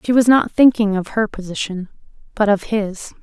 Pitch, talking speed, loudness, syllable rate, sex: 210 Hz, 185 wpm, -17 LUFS, 4.9 syllables/s, female